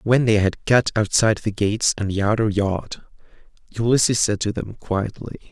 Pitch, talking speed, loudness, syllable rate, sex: 105 Hz, 175 wpm, -20 LUFS, 5.2 syllables/s, male